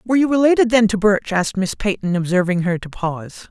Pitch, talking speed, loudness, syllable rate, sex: 205 Hz, 225 wpm, -18 LUFS, 6.1 syllables/s, female